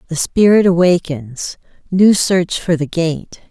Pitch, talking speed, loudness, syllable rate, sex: 170 Hz, 135 wpm, -14 LUFS, 3.8 syllables/s, female